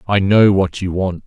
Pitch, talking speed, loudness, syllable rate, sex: 95 Hz, 235 wpm, -15 LUFS, 4.6 syllables/s, male